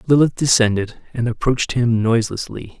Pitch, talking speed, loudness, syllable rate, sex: 120 Hz, 130 wpm, -18 LUFS, 5.6 syllables/s, male